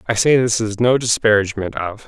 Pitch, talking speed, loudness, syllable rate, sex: 110 Hz, 205 wpm, -17 LUFS, 5.8 syllables/s, male